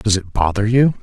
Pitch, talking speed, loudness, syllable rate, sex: 110 Hz, 235 wpm, -17 LUFS, 5.1 syllables/s, male